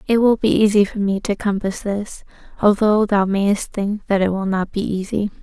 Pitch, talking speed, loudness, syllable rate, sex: 205 Hz, 210 wpm, -19 LUFS, 4.8 syllables/s, female